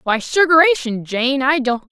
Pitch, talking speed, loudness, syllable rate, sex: 270 Hz, 155 wpm, -15 LUFS, 4.5 syllables/s, female